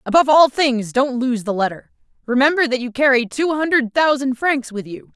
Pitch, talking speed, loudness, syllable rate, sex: 260 Hz, 200 wpm, -17 LUFS, 5.4 syllables/s, female